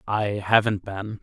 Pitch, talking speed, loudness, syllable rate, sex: 105 Hz, 145 wpm, -23 LUFS, 3.8 syllables/s, male